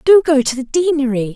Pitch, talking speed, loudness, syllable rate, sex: 280 Hz, 220 wpm, -15 LUFS, 5.6 syllables/s, female